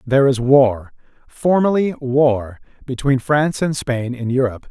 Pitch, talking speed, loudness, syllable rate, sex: 130 Hz, 115 wpm, -17 LUFS, 4.6 syllables/s, male